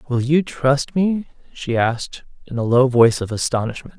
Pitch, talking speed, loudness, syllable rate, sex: 130 Hz, 180 wpm, -19 LUFS, 5.1 syllables/s, male